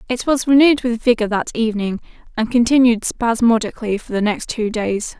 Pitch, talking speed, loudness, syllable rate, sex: 230 Hz, 175 wpm, -17 LUFS, 5.6 syllables/s, female